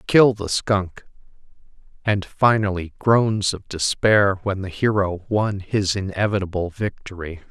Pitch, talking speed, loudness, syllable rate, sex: 100 Hz, 120 wpm, -21 LUFS, 4.0 syllables/s, male